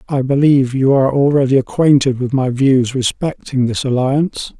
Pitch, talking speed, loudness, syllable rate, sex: 135 Hz, 155 wpm, -14 LUFS, 5.2 syllables/s, male